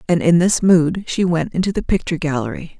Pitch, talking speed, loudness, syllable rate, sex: 170 Hz, 215 wpm, -17 LUFS, 5.8 syllables/s, female